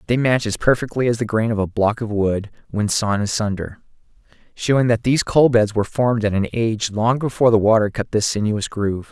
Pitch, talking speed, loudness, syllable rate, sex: 110 Hz, 210 wpm, -19 LUFS, 5.9 syllables/s, male